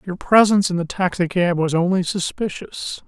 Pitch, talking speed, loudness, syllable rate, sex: 180 Hz, 155 wpm, -19 LUFS, 5.1 syllables/s, male